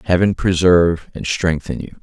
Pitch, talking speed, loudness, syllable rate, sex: 85 Hz, 150 wpm, -17 LUFS, 5.1 syllables/s, male